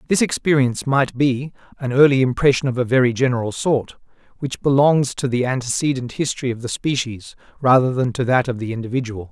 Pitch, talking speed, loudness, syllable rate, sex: 130 Hz, 180 wpm, -19 LUFS, 5.9 syllables/s, male